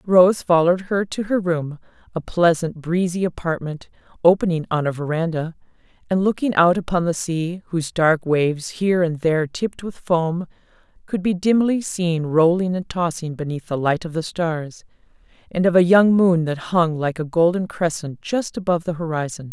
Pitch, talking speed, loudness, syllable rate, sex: 170 Hz, 175 wpm, -20 LUFS, 5.0 syllables/s, female